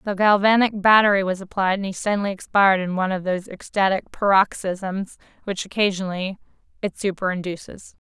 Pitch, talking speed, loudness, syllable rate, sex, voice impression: 195 Hz, 140 wpm, -21 LUFS, 5.9 syllables/s, female, feminine, adult-like, tensed, bright, clear, slightly nasal, calm, friendly, reassuring, unique, slightly lively, kind